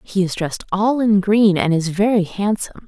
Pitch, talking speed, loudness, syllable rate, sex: 195 Hz, 210 wpm, -18 LUFS, 5.2 syllables/s, female